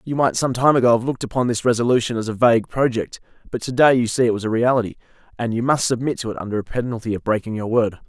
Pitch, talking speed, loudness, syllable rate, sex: 120 Hz, 260 wpm, -20 LUFS, 7.0 syllables/s, male